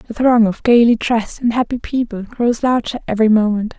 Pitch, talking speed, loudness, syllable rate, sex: 230 Hz, 190 wpm, -16 LUFS, 5.7 syllables/s, female